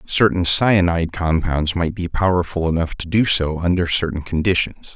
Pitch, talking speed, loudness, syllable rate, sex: 85 Hz, 155 wpm, -19 LUFS, 5.0 syllables/s, male